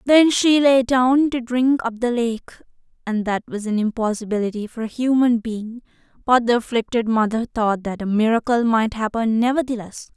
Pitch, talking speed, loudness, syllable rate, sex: 235 Hz, 170 wpm, -19 LUFS, 5.0 syllables/s, female